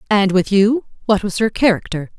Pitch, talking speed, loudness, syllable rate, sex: 205 Hz, 190 wpm, -17 LUFS, 5.2 syllables/s, female